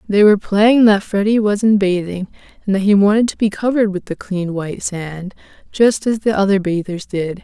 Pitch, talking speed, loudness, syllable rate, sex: 200 Hz, 210 wpm, -16 LUFS, 5.3 syllables/s, female